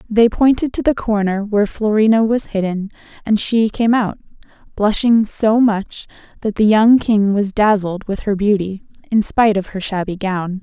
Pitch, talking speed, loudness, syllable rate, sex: 210 Hz, 175 wpm, -16 LUFS, 4.7 syllables/s, female